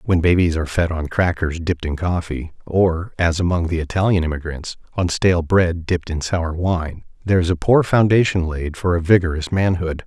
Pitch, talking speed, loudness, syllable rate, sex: 85 Hz, 190 wpm, -19 LUFS, 5.3 syllables/s, male